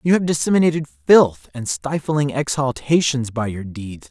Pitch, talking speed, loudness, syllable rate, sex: 135 Hz, 145 wpm, -19 LUFS, 4.5 syllables/s, male